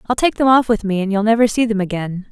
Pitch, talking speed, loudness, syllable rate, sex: 215 Hz, 310 wpm, -16 LUFS, 6.5 syllables/s, female